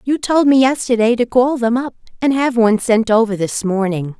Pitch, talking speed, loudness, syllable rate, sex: 235 Hz, 215 wpm, -15 LUFS, 5.2 syllables/s, female